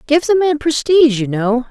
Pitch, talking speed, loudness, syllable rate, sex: 280 Hz, 210 wpm, -14 LUFS, 5.8 syllables/s, female